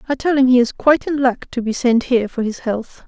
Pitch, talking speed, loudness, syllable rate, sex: 250 Hz, 295 wpm, -17 LUFS, 5.9 syllables/s, female